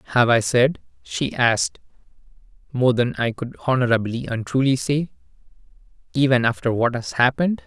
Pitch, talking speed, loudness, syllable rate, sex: 125 Hz, 135 wpm, -21 LUFS, 5.4 syllables/s, male